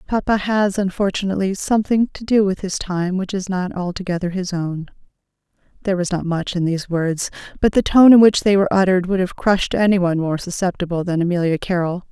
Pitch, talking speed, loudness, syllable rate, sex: 185 Hz, 200 wpm, -18 LUFS, 6.1 syllables/s, female